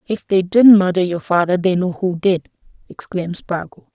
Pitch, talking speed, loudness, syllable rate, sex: 180 Hz, 185 wpm, -16 LUFS, 5.0 syllables/s, female